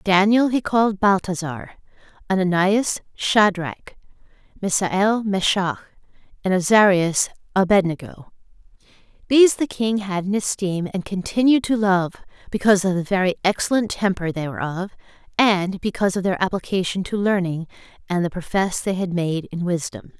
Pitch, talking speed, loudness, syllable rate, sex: 190 Hz, 135 wpm, -20 LUFS, 5.0 syllables/s, female